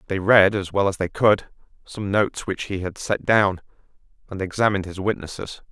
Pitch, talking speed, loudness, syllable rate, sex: 95 Hz, 190 wpm, -21 LUFS, 5.4 syllables/s, male